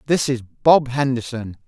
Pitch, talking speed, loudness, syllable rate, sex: 125 Hz, 145 wpm, -19 LUFS, 4.9 syllables/s, male